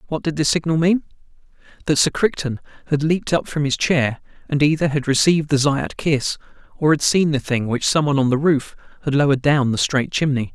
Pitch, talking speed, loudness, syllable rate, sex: 145 Hz, 210 wpm, -19 LUFS, 5.8 syllables/s, male